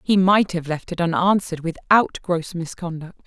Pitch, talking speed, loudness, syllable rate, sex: 175 Hz, 165 wpm, -21 LUFS, 4.8 syllables/s, female